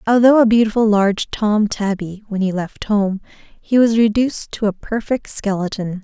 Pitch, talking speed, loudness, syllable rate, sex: 210 Hz, 170 wpm, -17 LUFS, 4.9 syllables/s, female